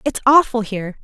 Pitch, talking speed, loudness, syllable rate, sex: 235 Hz, 175 wpm, -16 LUFS, 6.0 syllables/s, female